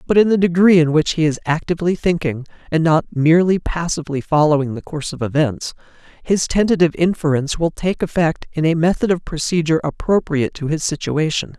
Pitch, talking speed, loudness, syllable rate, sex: 160 Hz, 175 wpm, -17 LUFS, 6.1 syllables/s, male